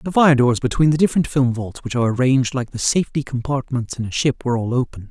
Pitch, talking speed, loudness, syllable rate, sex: 130 Hz, 245 wpm, -19 LUFS, 6.7 syllables/s, female